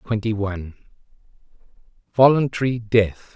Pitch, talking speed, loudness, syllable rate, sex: 110 Hz, 70 wpm, -20 LUFS, 4.8 syllables/s, male